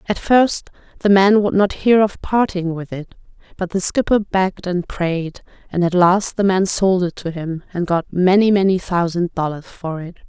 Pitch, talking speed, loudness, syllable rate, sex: 185 Hz, 200 wpm, -17 LUFS, 4.6 syllables/s, female